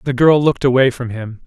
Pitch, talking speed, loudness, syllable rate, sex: 130 Hz, 245 wpm, -15 LUFS, 6.0 syllables/s, male